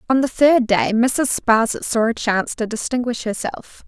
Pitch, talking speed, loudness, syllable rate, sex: 235 Hz, 185 wpm, -18 LUFS, 4.6 syllables/s, female